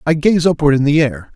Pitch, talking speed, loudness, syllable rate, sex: 150 Hz, 265 wpm, -14 LUFS, 5.7 syllables/s, male